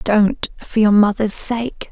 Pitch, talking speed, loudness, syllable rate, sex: 215 Hz, 155 wpm, -16 LUFS, 3.5 syllables/s, female